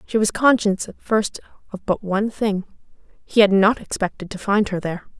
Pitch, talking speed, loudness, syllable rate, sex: 205 Hz, 185 wpm, -20 LUFS, 5.3 syllables/s, female